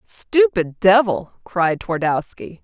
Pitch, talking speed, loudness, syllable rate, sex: 195 Hz, 90 wpm, -18 LUFS, 3.3 syllables/s, female